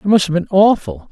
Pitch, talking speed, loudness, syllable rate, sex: 175 Hz, 270 wpm, -14 LUFS, 6.2 syllables/s, male